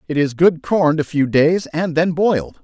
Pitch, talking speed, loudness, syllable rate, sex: 160 Hz, 225 wpm, -17 LUFS, 4.9 syllables/s, male